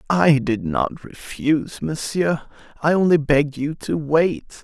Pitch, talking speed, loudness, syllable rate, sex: 155 Hz, 140 wpm, -20 LUFS, 3.9 syllables/s, male